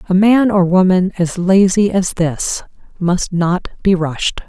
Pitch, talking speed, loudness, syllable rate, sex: 185 Hz, 160 wpm, -15 LUFS, 3.8 syllables/s, female